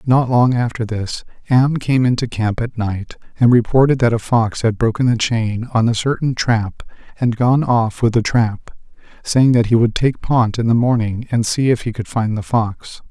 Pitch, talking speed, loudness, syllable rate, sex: 115 Hz, 210 wpm, -17 LUFS, 4.6 syllables/s, male